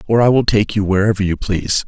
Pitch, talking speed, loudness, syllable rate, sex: 100 Hz, 255 wpm, -16 LUFS, 6.4 syllables/s, male